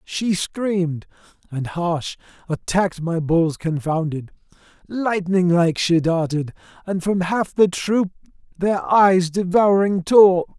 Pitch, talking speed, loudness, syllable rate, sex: 180 Hz, 120 wpm, -19 LUFS, 3.6 syllables/s, male